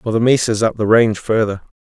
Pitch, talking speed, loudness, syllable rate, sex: 110 Hz, 225 wpm, -16 LUFS, 6.2 syllables/s, male